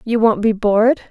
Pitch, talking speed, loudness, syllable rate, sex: 220 Hz, 215 wpm, -15 LUFS, 5.4 syllables/s, female